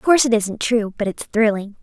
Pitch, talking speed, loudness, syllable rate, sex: 225 Hz, 265 wpm, -19 LUFS, 5.9 syllables/s, female